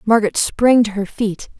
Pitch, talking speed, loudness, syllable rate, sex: 215 Hz, 190 wpm, -16 LUFS, 4.9 syllables/s, female